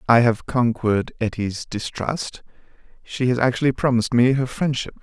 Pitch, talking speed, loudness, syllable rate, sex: 120 Hz, 145 wpm, -21 LUFS, 5.1 syllables/s, male